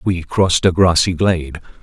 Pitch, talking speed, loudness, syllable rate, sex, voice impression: 85 Hz, 165 wpm, -15 LUFS, 5.2 syllables/s, male, masculine, middle-aged, tensed, powerful, slightly muffled, slightly raspy, cool, calm, mature, wild, lively, strict